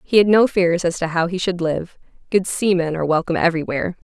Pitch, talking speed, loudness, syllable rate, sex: 175 Hz, 205 wpm, -19 LUFS, 6.4 syllables/s, female